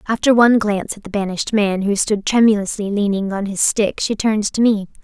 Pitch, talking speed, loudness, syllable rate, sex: 205 Hz, 215 wpm, -17 LUFS, 5.9 syllables/s, female